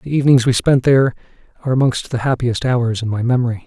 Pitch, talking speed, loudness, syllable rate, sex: 125 Hz, 215 wpm, -16 LUFS, 6.6 syllables/s, male